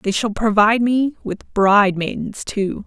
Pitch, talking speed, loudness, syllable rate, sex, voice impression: 215 Hz, 170 wpm, -18 LUFS, 4.4 syllables/s, female, feminine, adult-like, tensed, clear, fluent, intellectual, slightly calm, elegant, lively, slightly strict, slightly sharp